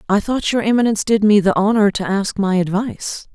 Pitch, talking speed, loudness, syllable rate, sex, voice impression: 210 Hz, 215 wpm, -17 LUFS, 5.8 syllables/s, female, feminine, slightly young, adult-like, tensed, powerful, slightly bright, clear, very fluent, slightly cool, slightly intellectual, slightly sincere, calm, slightly elegant, very lively, slightly strict, slightly sharp